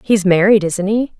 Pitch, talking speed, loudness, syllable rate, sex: 200 Hz, 200 wpm, -14 LUFS, 4.6 syllables/s, female